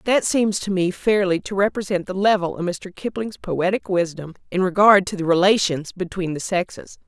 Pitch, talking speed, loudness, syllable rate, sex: 190 Hz, 185 wpm, -20 LUFS, 5.1 syllables/s, female